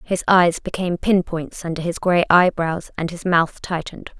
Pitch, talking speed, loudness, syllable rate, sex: 175 Hz, 185 wpm, -19 LUFS, 4.8 syllables/s, female